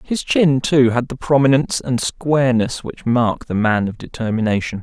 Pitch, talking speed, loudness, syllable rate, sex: 125 Hz, 175 wpm, -17 LUFS, 4.9 syllables/s, male